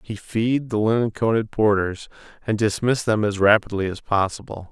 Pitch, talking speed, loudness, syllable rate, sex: 105 Hz, 165 wpm, -21 LUFS, 5.2 syllables/s, male